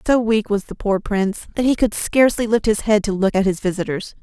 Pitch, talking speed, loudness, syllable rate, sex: 210 Hz, 255 wpm, -19 LUFS, 5.9 syllables/s, female